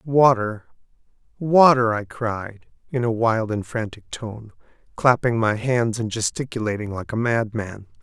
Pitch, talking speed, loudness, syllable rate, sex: 115 Hz, 135 wpm, -21 LUFS, 4.2 syllables/s, male